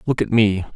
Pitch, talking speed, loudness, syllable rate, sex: 110 Hz, 240 wpm, -18 LUFS, 5.4 syllables/s, male